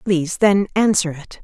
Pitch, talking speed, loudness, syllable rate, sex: 185 Hz, 165 wpm, -17 LUFS, 4.9 syllables/s, female